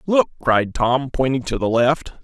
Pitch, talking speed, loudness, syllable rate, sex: 135 Hz, 190 wpm, -19 LUFS, 4.3 syllables/s, male